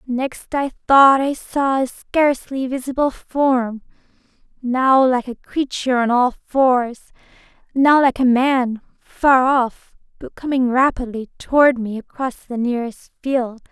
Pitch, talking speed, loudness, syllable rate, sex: 255 Hz, 130 wpm, -18 LUFS, 3.9 syllables/s, female